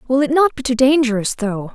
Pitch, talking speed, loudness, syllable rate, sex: 255 Hz, 240 wpm, -16 LUFS, 5.7 syllables/s, female